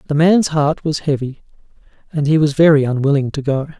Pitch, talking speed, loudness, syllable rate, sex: 150 Hz, 190 wpm, -16 LUFS, 5.6 syllables/s, male